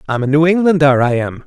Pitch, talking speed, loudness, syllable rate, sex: 145 Hz, 245 wpm, -13 LUFS, 6.1 syllables/s, male